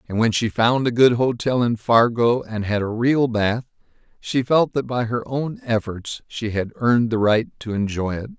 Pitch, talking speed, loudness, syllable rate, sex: 115 Hz, 210 wpm, -20 LUFS, 4.6 syllables/s, male